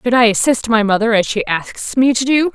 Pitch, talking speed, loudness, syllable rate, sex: 235 Hz, 260 wpm, -15 LUFS, 5.2 syllables/s, female